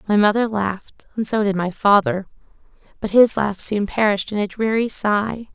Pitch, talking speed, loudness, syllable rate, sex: 205 Hz, 185 wpm, -19 LUFS, 5.1 syllables/s, female